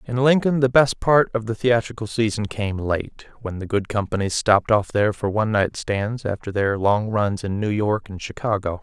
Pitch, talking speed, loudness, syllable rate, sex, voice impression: 110 Hz, 210 wpm, -21 LUFS, 5.0 syllables/s, male, masculine, adult-like, tensed, powerful, slightly dark, clear, slightly fluent, cool, intellectual, calm, reassuring, wild, slightly modest